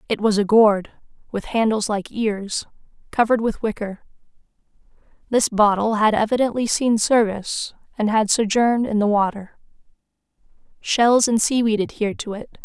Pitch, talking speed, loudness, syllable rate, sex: 220 Hz, 140 wpm, -20 LUFS, 5.0 syllables/s, female